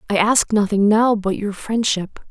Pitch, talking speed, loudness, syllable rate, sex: 210 Hz, 185 wpm, -18 LUFS, 4.3 syllables/s, female